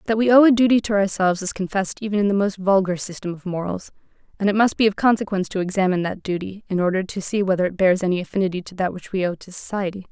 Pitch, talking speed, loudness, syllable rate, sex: 195 Hz, 255 wpm, -21 LUFS, 7.1 syllables/s, female